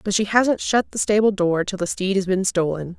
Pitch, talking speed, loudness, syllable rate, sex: 195 Hz, 260 wpm, -20 LUFS, 5.2 syllables/s, female